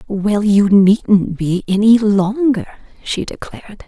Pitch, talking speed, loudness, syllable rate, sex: 205 Hz, 125 wpm, -14 LUFS, 3.7 syllables/s, female